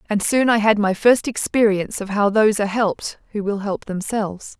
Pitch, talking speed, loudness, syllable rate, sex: 210 Hz, 210 wpm, -19 LUFS, 5.6 syllables/s, female